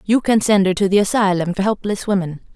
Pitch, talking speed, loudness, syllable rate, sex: 200 Hz, 235 wpm, -17 LUFS, 6.0 syllables/s, female